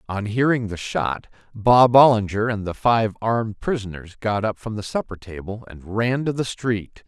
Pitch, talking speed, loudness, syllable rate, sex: 110 Hz, 185 wpm, -21 LUFS, 4.6 syllables/s, male